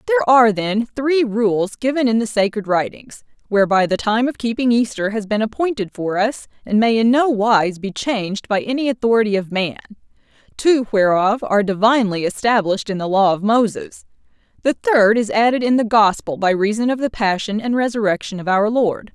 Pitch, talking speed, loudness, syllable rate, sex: 220 Hz, 190 wpm, -17 LUFS, 5.4 syllables/s, female